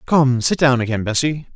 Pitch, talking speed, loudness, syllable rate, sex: 135 Hz, 195 wpm, -17 LUFS, 5.1 syllables/s, male